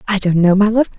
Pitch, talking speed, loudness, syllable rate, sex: 200 Hz, 305 wpm, -13 LUFS, 6.5 syllables/s, female